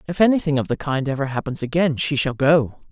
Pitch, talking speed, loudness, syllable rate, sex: 145 Hz, 225 wpm, -20 LUFS, 6.0 syllables/s, female